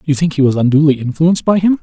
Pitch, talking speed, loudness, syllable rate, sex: 155 Hz, 265 wpm, -13 LUFS, 7.1 syllables/s, male